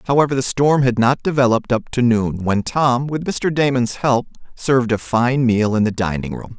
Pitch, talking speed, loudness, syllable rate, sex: 125 Hz, 210 wpm, -18 LUFS, 5.0 syllables/s, male